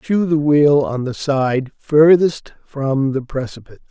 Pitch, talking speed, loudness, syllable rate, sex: 140 Hz, 155 wpm, -16 LUFS, 4.0 syllables/s, male